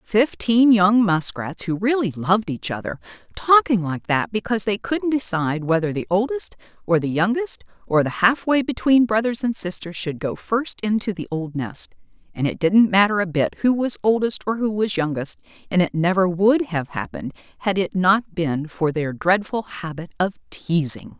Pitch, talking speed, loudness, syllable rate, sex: 190 Hz, 180 wpm, -21 LUFS, 4.8 syllables/s, female